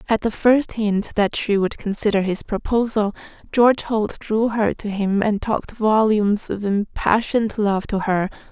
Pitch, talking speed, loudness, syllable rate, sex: 210 Hz, 170 wpm, -20 LUFS, 4.5 syllables/s, female